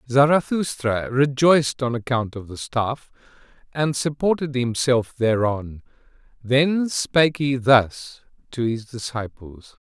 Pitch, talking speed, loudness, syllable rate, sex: 130 Hz, 110 wpm, -21 LUFS, 3.8 syllables/s, male